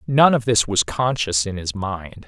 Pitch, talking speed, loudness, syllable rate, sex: 105 Hz, 210 wpm, -19 LUFS, 4.2 syllables/s, male